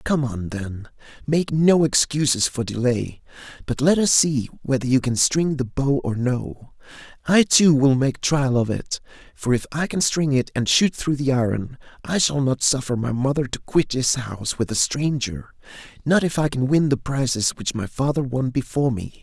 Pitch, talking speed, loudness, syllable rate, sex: 135 Hz, 200 wpm, -21 LUFS, 4.7 syllables/s, male